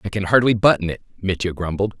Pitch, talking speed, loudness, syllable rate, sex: 100 Hz, 210 wpm, -19 LUFS, 6.4 syllables/s, male